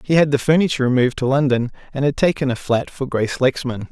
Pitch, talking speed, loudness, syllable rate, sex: 135 Hz, 230 wpm, -19 LUFS, 6.7 syllables/s, male